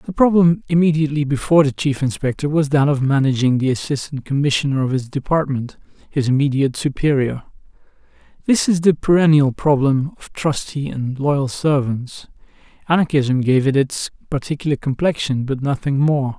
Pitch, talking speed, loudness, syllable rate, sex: 140 Hz, 145 wpm, -18 LUFS, 5.4 syllables/s, male